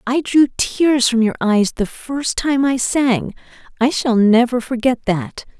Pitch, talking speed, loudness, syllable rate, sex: 245 Hz, 160 wpm, -17 LUFS, 3.8 syllables/s, female